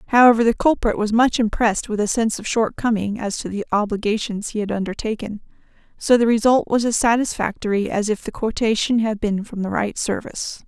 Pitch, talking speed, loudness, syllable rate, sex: 220 Hz, 190 wpm, -20 LUFS, 5.9 syllables/s, female